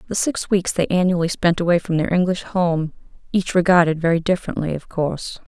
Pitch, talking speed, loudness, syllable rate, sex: 175 Hz, 185 wpm, -20 LUFS, 5.8 syllables/s, female